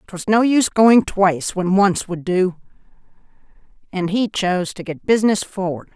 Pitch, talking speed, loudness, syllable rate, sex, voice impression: 190 Hz, 160 wpm, -18 LUFS, 5.0 syllables/s, female, feminine, adult-like, tensed, powerful, slightly hard, clear, slightly raspy, slightly friendly, lively, slightly strict, intense, slightly sharp